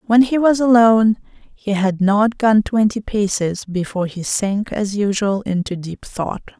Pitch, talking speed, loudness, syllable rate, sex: 210 Hz, 165 wpm, -17 LUFS, 4.3 syllables/s, female